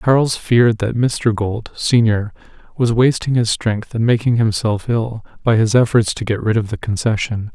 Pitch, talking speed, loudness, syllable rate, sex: 115 Hz, 185 wpm, -17 LUFS, 4.7 syllables/s, male